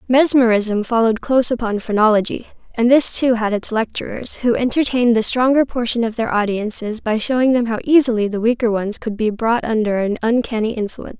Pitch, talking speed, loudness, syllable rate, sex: 230 Hz, 180 wpm, -17 LUFS, 5.7 syllables/s, female